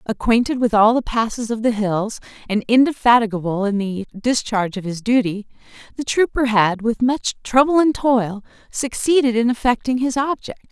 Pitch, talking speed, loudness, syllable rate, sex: 230 Hz, 160 wpm, -18 LUFS, 5.0 syllables/s, female